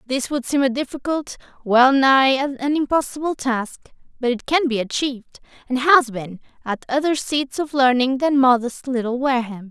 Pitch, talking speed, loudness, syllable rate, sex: 260 Hz, 165 wpm, -19 LUFS, 4.8 syllables/s, female